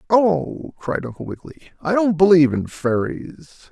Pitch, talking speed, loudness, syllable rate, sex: 165 Hz, 145 wpm, -19 LUFS, 4.9 syllables/s, male